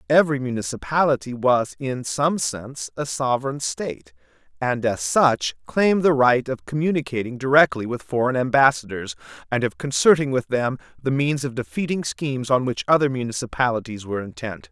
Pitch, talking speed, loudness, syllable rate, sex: 125 Hz, 150 wpm, -22 LUFS, 5.4 syllables/s, male